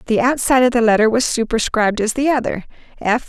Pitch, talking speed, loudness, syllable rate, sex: 235 Hz, 200 wpm, -16 LUFS, 6.5 syllables/s, female